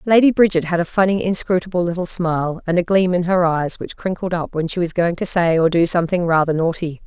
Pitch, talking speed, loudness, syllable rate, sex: 175 Hz, 240 wpm, -18 LUFS, 6.0 syllables/s, female